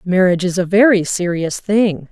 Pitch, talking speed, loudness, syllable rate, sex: 185 Hz, 170 wpm, -15 LUFS, 5.0 syllables/s, female